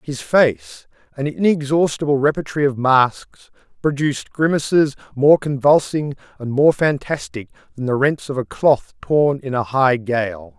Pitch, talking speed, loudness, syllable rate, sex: 135 Hz, 140 wpm, -18 LUFS, 4.4 syllables/s, male